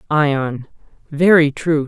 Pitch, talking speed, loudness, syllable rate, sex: 150 Hz, 95 wpm, -16 LUFS, 3.1 syllables/s, male